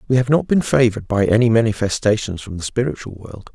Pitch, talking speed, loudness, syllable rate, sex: 115 Hz, 205 wpm, -18 LUFS, 6.3 syllables/s, male